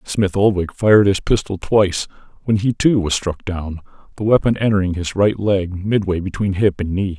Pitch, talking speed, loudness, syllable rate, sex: 95 Hz, 190 wpm, -18 LUFS, 5.1 syllables/s, male